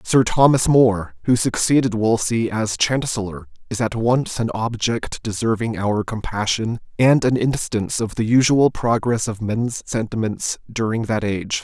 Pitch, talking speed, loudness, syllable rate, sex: 115 Hz, 150 wpm, -20 LUFS, 4.4 syllables/s, male